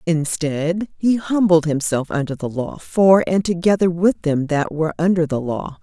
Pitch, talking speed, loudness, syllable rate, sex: 165 Hz, 175 wpm, -19 LUFS, 4.5 syllables/s, female